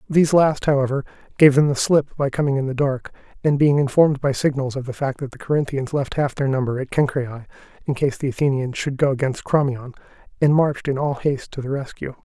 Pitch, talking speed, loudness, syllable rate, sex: 135 Hz, 215 wpm, -20 LUFS, 5.9 syllables/s, male